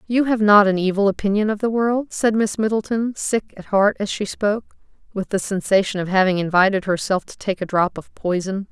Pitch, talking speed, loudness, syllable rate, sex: 205 Hz, 215 wpm, -20 LUFS, 5.5 syllables/s, female